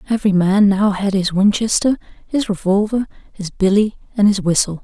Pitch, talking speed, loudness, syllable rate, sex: 200 Hz, 160 wpm, -16 LUFS, 5.3 syllables/s, female